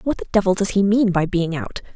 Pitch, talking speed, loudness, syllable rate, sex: 195 Hz, 275 wpm, -19 LUFS, 5.8 syllables/s, female